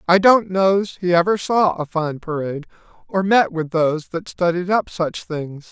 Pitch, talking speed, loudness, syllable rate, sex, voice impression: 175 Hz, 190 wpm, -19 LUFS, 4.5 syllables/s, male, masculine, middle-aged, slightly thin, relaxed, slightly weak, slightly halting, raspy, friendly, unique, lively, slightly intense, slightly sharp, light